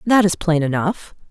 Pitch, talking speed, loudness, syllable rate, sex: 175 Hz, 185 wpm, -18 LUFS, 4.6 syllables/s, female